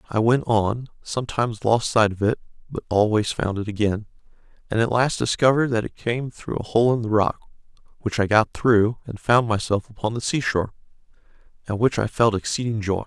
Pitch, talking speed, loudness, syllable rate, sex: 115 Hz, 195 wpm, -22 LUFS, 5.6 syllables/s, male